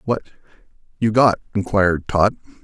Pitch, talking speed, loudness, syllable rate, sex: 105 Hz, 115 wpm, -19 LUFS, 5.6 syllables/s, male